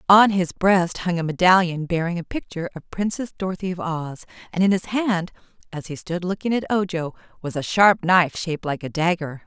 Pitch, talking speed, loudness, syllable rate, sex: 175 Hz, 205 wpm, -22 LUFS, 5.5 syllables/s, female